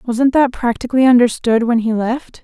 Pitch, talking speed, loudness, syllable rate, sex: 240 Hz, 175 wpm, -15 LUFS, 5.0 syllables/s, female